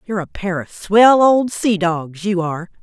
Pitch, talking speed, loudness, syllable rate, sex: 190 Hz, 215 wpm, -16 LUFS, 4.6 syllables/s, female